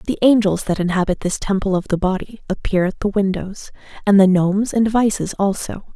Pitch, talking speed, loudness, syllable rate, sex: 195 Hz, 190 wpm, -18 LUFS, 5.5 syllables/s, female